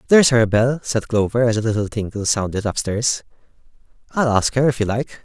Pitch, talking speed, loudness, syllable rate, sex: 115 Hz, 205 wpm, -19 LUFS, 5.8 syllables/s, male